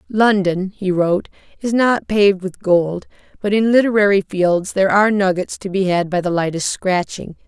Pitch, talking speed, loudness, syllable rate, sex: 195 Hz, 175 wpm, -17 LUFS, 5.1 syllables/s, female